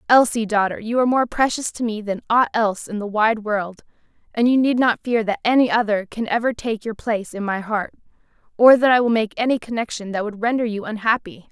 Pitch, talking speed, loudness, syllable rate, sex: 225 Hz, 225 wpm, -20 LUFS, 5.8 syllables/s, female